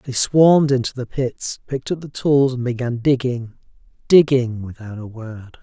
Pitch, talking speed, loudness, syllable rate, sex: 125 Hz, 170 wpm, -18 LUFS, 4.7 syllables/s, male